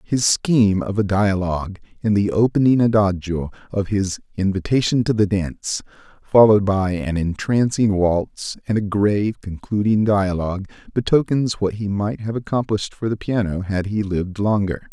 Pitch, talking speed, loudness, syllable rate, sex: 100 Hz, 155 wpm, -20 LUFS, 4.9 syllables/s, male